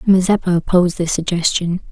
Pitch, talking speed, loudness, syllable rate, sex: 180 Hz, 125 wpm, -16 LUFS, 5.8 syllables/s, female